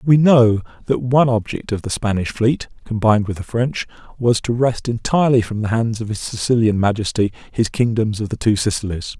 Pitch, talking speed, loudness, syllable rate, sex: 115 Hz, 195 wpm, -18 LUFS, 5.5 syllables/s, male